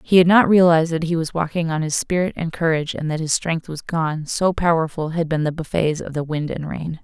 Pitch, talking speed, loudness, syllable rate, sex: 165 Hz, 255 wpm, -20 LUFS, 5.6 syllables/s, female